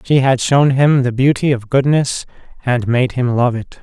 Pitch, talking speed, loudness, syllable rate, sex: 130 Hz, 205 wpm, -15 LUFS, 4.5 syllables/s, male